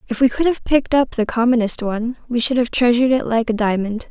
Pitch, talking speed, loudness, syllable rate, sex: 240 Hz, 250 wpm, -18 LUFS, 6.3 syllables/s, female